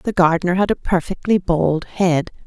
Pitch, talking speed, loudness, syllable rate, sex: 180 Hz, 170 wpm, -18 LUFS, 4.8 syllables/s, female